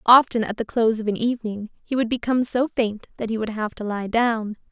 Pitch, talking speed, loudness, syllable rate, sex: 225 Hz, 240 wpm, -23 LUFS, 6.0 syllables/s, female